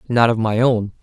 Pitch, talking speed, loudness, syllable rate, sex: 115 Hz, 235 wpm, -17 LUFS, 5.2 syllables/s, male